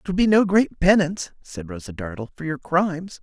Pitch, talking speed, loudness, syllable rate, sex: 165 Hz, 225 wpm, -21 LUFS, 5.6 syllables/s, male